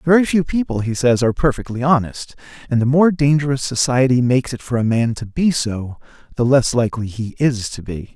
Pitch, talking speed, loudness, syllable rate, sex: 130 Hz, 205 wpm, -18 LUFS, 5.6 syllables/s, male